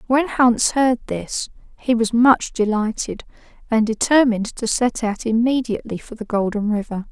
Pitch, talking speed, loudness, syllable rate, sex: 230 Hz, 150 wpm, -19 LUFS, 4.8 syllables/s, female